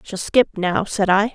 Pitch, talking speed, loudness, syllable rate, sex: 205 Hz, 225 wpm, -19 LUFS, 4.3 syllables/s, female